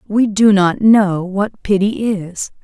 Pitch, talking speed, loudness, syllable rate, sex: 200 Hz, 160 wpm, -14 LUFS, 3.3 syllables/s, female